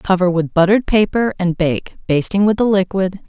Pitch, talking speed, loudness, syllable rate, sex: 190 Hz, 185 wpm, -16 LUFS, 5.3 syllables/s, female